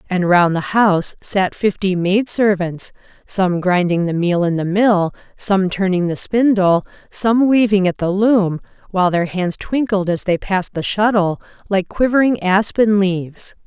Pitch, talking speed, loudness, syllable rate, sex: 195 Hz, 160 wpm, -16 LUFS, 4.3 syllables/s, female